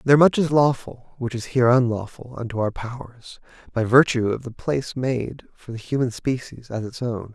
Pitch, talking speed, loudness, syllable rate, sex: 125 Hz, 195 wpm, -22 LUFS, 5.4 syllables/s, male